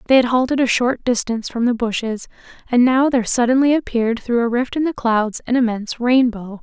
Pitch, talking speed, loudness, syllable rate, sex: 240 Hz, 210 wpm, -18 LUFS, 5.8 syllables/s, female